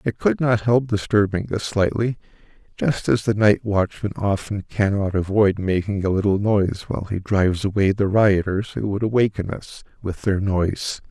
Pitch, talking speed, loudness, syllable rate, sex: 100 Hz, 175 wpm, -21 LUFS, 4.9 syllables/s, male